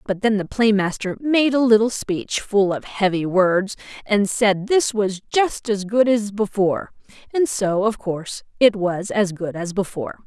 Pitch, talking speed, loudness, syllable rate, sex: 205 Hz, 180 wpm, -20 LUFS, 4.4 syllables/s, female